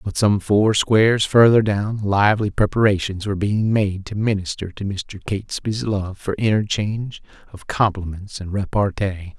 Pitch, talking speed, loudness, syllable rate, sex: 100 Hz, 145 wpm, -20 LUFS, 4.7 syllables/s, male